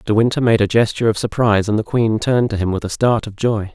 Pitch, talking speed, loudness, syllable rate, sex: 110 Hz, 290 wpm, -17 LUFS, 6.6 syllables/s, male